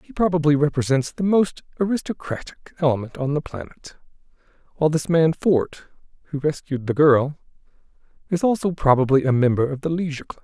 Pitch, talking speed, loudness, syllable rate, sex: 150 Hz, 155 wpm, -21 LUFS, 5.9 syllables/s, male